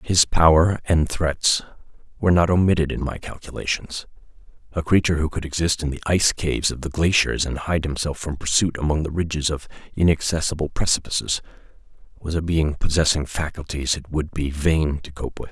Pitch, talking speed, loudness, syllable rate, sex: 80 Hz, 175 wpm, -22 LUFS, 5.5 syllables/s, male